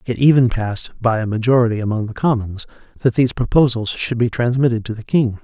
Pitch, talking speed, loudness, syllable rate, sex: 115 Hz, 200 wpm, -18 LUFS, 6.1 syllables/s, male